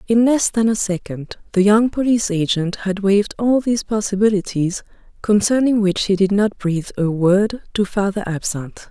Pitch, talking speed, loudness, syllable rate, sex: 200 Hz, 170 wpm, -18 LUFS, 5.2 syllables/s, female